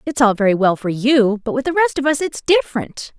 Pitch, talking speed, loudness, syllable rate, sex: 255 Hz, 265 wpm, -17 LUFS, 5.6 syllables/s, female